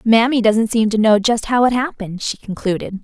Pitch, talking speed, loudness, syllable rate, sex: 225 Hz, 220 wpm, -17 LUFS, 5.5 syllables/s, female